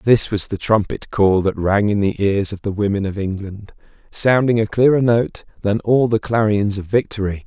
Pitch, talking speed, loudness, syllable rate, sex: 105 Hz, 200 wpm, -18 LUFS, 4.8 syllables/s, male